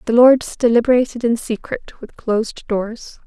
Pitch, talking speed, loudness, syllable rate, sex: 235 Hz, 145 wpm, -17 LUFS, 4.7 syllables/s, female